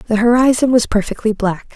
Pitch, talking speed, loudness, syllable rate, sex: 225 Hz, 170 wpm, -15 LUFS, 5.3 syllables/s, female